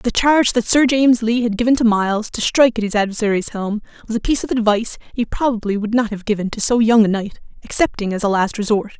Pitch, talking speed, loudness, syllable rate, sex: 225 Hz, 245 wpm, -17 LUFS, 6.5 syllables/s, female